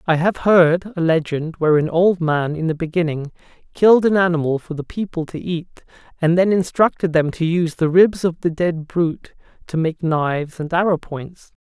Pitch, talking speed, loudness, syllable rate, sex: 170 Hz, 190 wpm, -18 LUFS, 5.0 syllables/s, male